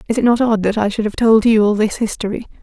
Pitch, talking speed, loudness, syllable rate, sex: 220 Hz, 295 wpm, -15 LUFS, 6.5 syllables/s, female